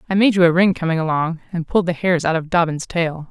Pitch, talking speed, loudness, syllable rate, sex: 170 Hz, 275 wpm, -18 LUFS, 6.4 syllables/s, female